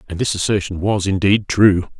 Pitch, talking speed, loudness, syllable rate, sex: 95 Hz, 180 wpm, -17 LUFS, 5.1 syllables/s, male